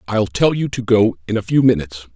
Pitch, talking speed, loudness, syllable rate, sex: 110 Hz, 250 wpm, -17 LUFS, 5.9 syllables/s, male